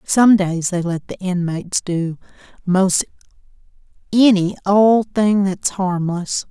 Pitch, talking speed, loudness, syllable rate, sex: 190 Hz, 120 wpm, -17 LUFS, 3.6 syllables/s, female